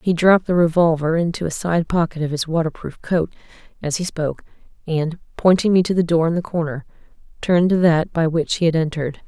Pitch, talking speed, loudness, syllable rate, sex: 165 Hz, 205 wpm, -19 LUFS, 6.0 syllables/s, female